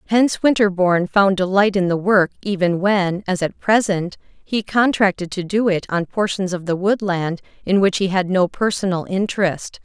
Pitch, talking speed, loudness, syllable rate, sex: 190 Hz, 175 wpm, -18 LUFS, 4.8 syllables/s, female